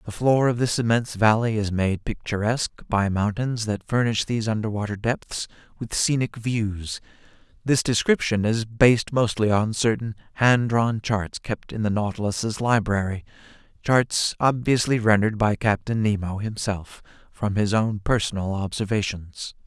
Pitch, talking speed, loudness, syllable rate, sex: 110 Hz, 140 wpm, -23 LUFS, 4.6 syllables/s, male